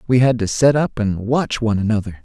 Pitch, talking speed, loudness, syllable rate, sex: 115 Hz, 240 wpm, -18 LUFS, 5.8 syllables/s, male